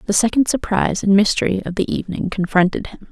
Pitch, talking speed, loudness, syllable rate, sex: 200 Hz, 190 wpm, -18 LUFS, 6.5 syllables/s, female